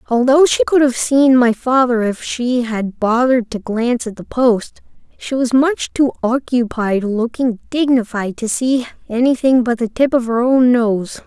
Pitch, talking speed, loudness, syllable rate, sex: 245 Hz, 175 wpm, -16 LUFS, 4.4 syllables/s, female